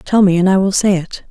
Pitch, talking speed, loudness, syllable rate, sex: 190 Hz, 320 wpm, -13 LUFS, 5.6 syllables/s, female